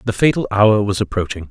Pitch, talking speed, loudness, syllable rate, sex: 105 Hz, 200 wpm, -16 LUFS, 5.8 syllables/s, male